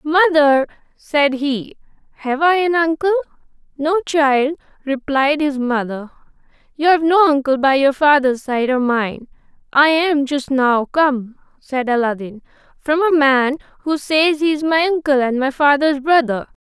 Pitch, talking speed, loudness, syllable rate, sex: 285 Hz, 150 wpm, -16 LUFS, 4.3 syllables/s, female